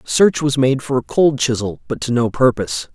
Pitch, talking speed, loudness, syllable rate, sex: 130 Hz, 225 wpm, -17 LUFS, 5.0 syllables/s, male